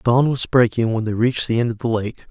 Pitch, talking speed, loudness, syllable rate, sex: 120 Hz, 285 wpm, -19 LUFS, 5.9 syllables/s, male